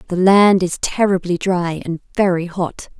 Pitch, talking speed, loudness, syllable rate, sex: 180 Hz, 160 wpm, -17 LUFS, 4.2 syllables/s, female